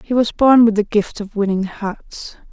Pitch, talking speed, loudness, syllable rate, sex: 215 Hz, 215 wpm, -16 LUFS, 4.4 syllables/s, female